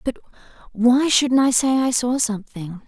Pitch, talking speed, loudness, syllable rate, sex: 245 Hz, 165 wpm, -18 LUFS, 4.6 syllables/s, female